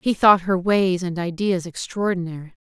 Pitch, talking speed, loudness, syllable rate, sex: 185 Hz, 160 wpm, -21 LUFS, 4.8 syllables/s, female